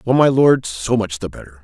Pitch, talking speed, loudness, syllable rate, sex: 115 Hz, 255 wpm, -16 LUFS, 5.3 syllables/s, male